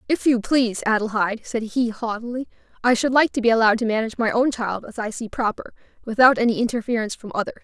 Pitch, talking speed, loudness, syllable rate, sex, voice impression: 230 Hz, 210 wpm, -21 LUFS, 6.8 syllables/s, female, feminine, adult-like, tensed, bright, clear, fluent, intellectual, elegant, lively, slightly sharp, light